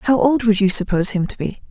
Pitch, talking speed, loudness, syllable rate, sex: 215 Hz, 280 wpm, -17 LUFS, 6.2 syllables/s, female